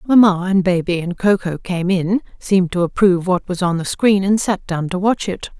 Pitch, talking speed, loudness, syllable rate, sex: 185 Hz, 235 wpm, -17 LUFS, 5.2 syllables/s, female